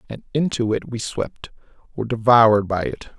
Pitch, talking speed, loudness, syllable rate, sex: 115 Hz, 170 wpm, -20 LUFS, 5.3 syllables/s, male